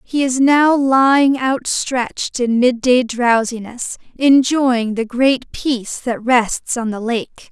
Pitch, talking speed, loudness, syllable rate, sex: 250 Hz, 135 wpm, -16 LUFS, 3.6 syllables/s, female